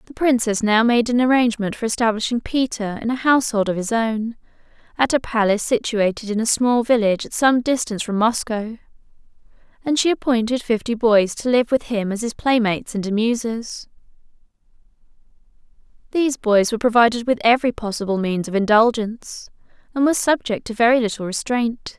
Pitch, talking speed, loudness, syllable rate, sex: 230 Hz, 160 wpm, -19 LUFS, 5.8 syllables/s, female